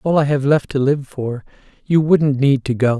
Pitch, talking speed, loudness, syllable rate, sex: 140 Hz, 240 wpm, -17 LUFS, 4.8 syllables/s, male